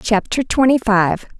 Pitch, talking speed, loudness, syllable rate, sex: 225 Hz, 130 wpm, -16 LUFS, 4.1 syllables/s, female